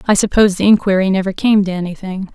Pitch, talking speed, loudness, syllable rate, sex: 195 Hz, 205 wpm, -14 LUFS, 6.9 syllables/s, female